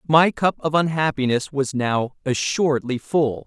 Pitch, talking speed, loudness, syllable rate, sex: 145 Hz, 140 wpm, -21 LUFS, 4.4 syllables/s, male